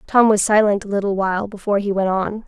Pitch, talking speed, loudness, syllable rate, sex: 200 Hz, 245 wpm, -18 LUFS, 6.4 syllables/s, female